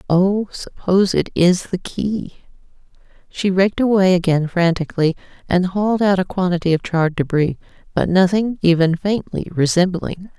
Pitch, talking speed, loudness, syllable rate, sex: 180 Hz, 150 wpm, -18 LUFS, 5.2 syllables/s, female